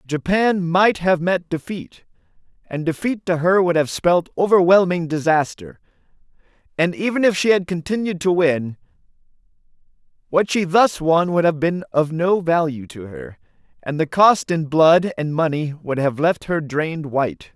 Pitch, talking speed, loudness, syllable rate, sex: 170 Hz, 160 wpm, -18 LUFS, 4.5 syllables/s, male